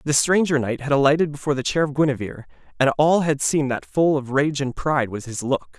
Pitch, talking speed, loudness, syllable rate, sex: 140 Hz, 240 wpm, -21 LUFS, 6.0 syllables/s, male